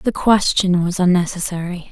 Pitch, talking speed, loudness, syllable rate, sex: 180 Hz, 125 wpm, -17 LUFS, 4.8 syllables/s, female